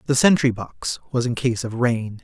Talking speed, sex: 215 wpm, male